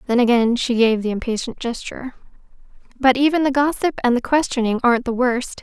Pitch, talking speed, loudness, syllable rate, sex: 250 Hz, 180 wpm, -19 LUFS, 6.0 syllables/s, female